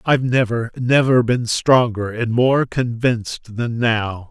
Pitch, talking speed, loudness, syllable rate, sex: 120 Hz, 140 wpm, -18 LUFS, 3.9 syllables/s, male